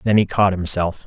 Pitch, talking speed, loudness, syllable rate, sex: 95 Hz, 225 wpm, -17 LUFS, 5.3 syllables/s, male